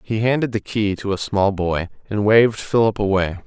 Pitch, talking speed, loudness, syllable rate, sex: 105 Hz, 210 wpm, -19 LUFS, 5.0 syllables/s, male